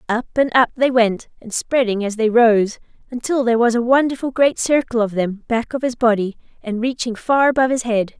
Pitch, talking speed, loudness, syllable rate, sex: 235 Hz, 210 wpm, -18 LUFS, 5.4 syllables/s, female